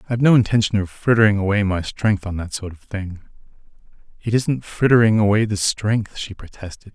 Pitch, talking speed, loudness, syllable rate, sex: 105 Hz, 180 wpm, -19 LUFS, 5.6 syllables/s, male